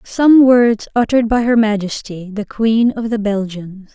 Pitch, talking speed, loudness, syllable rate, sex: 220 Hz, 165 wpm, -14 LUFS, 4.3 syllables/s, female